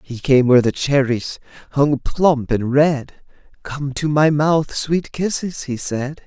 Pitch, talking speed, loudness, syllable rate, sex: 140 Hz, 165 wpm, -18 LUFS, 3.7 syllables/s, male